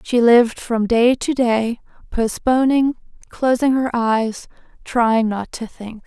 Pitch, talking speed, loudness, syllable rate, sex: 235 Hz, 140 wpm, -18 LUFS, 3.6 syllables/s, female